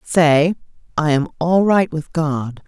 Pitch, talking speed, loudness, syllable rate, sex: 160 Hz, 155 wpm, -17 LUFS, 3.5 syllables/s, female